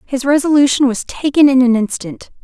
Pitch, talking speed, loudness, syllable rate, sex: 265 Hz, 175 wpm, -13 LUFS, 5.3 syllables/s, female